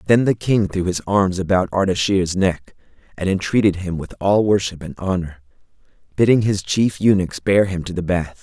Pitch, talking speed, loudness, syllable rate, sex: 95 Hz, 185 wpm, -19 LUFS, 5.0 syllables/s, male